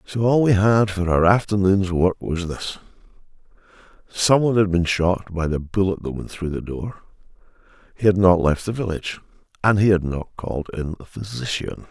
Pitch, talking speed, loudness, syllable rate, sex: 95 Hz, 185 wpm, -21 LUFS, 5.1 syllables/s, male